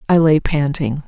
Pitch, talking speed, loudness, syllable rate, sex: 150 Hz, 170 wpm, -16 LUFS, 4.6 syllables/s, female